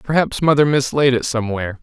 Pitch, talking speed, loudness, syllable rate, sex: 130 Hz, 165 wpm, -17 LUFS, 6.4 syllables/s, male